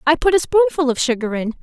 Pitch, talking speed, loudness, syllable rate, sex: 290 Hz, 260 wpm, -17 LUFS, 6.3 syllables/s, female